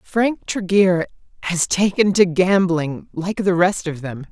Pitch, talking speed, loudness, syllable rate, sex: 180 Hz, 140 wpm, -18 LUFS, 4.0 syllables/s, female